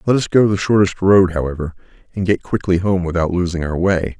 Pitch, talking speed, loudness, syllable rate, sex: 95 Hz, 215 wpm, -17 LUFS, 5.7 syllables/s, male